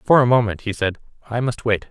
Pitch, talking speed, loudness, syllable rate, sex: 115 Hz, 250 wpm, -20 LUFS, 6.1 syllables/s, male